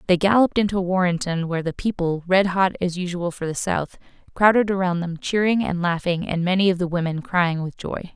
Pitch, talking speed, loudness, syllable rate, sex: 180 Hz, 205 wpm, -21 LUFS, 5.6 syllables/s, female